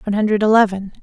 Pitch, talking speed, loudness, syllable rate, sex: 210 Hz, 175 wpm, -16 LUFS, 8.4 syllables/s, female